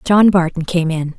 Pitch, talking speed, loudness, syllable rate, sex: 175 Hz, 200 wpm, -15 LUFS, 4.6 syllables/s, female